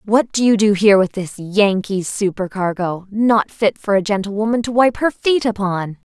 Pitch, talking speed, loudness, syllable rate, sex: 205 Hz, 185 wpm, -17 LUFS, 4.8 syllables/s, female